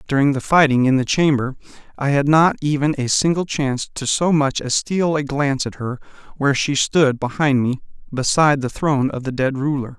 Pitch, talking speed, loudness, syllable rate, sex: 140 Hz, 205 wpm, -18 LUFS, 5.5 syllables/s, male